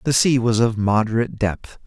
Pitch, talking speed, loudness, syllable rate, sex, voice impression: 115 Hz, 195 wpm, -19 LUFS, 5.3 syllables/s, male, masculine, adult-like, bright, clear, fluent, cool, intellectual, refreshing, sincere, kind, light